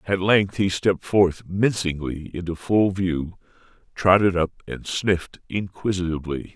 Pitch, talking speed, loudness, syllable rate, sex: 95 Hz, 130 wpm, -22 LUFS, 4.5 syllables/s, male